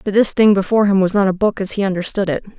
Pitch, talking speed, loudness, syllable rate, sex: 195 Hz, 300 wpm, -16 LUFS, 7.2 syllables/s, female